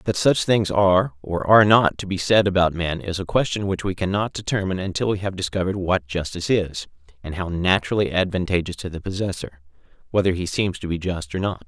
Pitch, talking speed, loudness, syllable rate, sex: 95 Hz, 210 wpm, -21 LUFS, 6.0 syllables/s, male